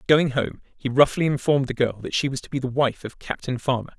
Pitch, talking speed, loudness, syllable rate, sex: 130 Hz, 255 wpm, -23 LUFS, 6.0 syllables/s, male